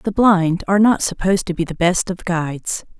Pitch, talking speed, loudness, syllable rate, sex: 185 Hz, 220 wpm, -18 LUFS, 5.4 syllables/s, female